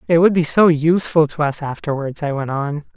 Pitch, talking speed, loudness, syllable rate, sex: 155 Hz, 225 wpm, -17 LUFS, 5.6 syllables/s, male